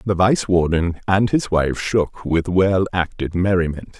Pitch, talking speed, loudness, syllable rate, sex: 90 Hz, 165 wpm, -19 LUFS, 4.0 syllables/s, male